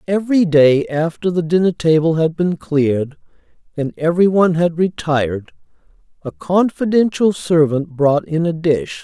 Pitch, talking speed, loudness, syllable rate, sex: 165 Hz, 135 wpm, -16 LUFS, 4.6 syllables/s, male